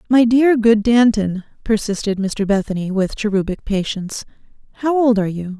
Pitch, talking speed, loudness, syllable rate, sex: 215 Hz, 150 wpm, -17 LUFS, 5.2 syllables/s, female